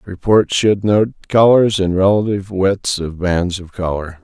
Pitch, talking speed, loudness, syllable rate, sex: 95 Hz, 155 wpm, -15 LUFS, 4.1 syllables/s, male